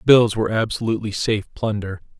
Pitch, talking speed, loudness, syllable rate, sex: 105 Hz, 135 wpm, -21 LUFS, 6.2 syllables/s, male